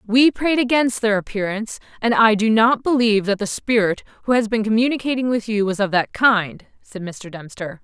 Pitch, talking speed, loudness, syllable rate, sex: 220 Hz, 200 wpm, -18 LUFS, 5.4 syllables/s, female